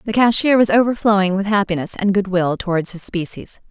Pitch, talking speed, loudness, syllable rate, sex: 200 Hz, 180 wpm, -17 LUFS, 5.7 syllables/s, female